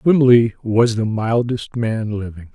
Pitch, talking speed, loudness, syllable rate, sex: 115 Hz, 140 wpm, -17 LUFS, 3.7 syllables/s, male